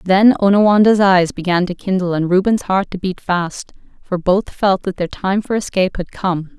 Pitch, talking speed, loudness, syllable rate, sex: 190 Hz, 200 wpm, -16 LUFS, 4.9 syllables/s, female